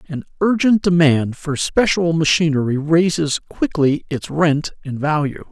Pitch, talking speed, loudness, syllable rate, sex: 160 Hz, 130 wpm, -17 LUFS, 4.2 syllables/s, male